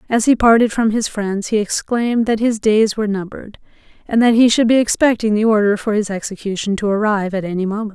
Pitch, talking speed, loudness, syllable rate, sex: 215 Hz, 220 wpm, -16 LUFS, 6.2 syllables/s, female